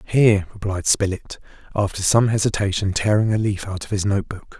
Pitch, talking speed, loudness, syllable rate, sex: 100 Hz, 185 wpm, -20 LUFS, 5.4 syllables/s, male